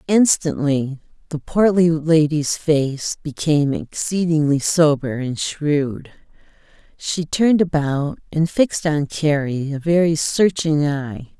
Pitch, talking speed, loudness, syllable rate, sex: 155 Hz, 110 wpm, -19 LUFS, 3.7 syllables/s, female